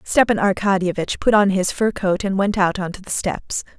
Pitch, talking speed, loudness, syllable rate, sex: 195 Hz, 205 wpm, -19 LUFS, 5.1 syllables/s, female